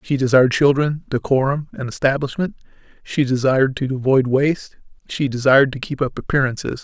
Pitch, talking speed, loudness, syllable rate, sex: 135 Hz, 150 wpm, -18 LUFS, 5.8 syllables/s, male